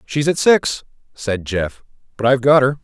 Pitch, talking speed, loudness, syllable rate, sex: 130 Hz, 190 wpm, -17 LUFS, 4.8 syllables/s, male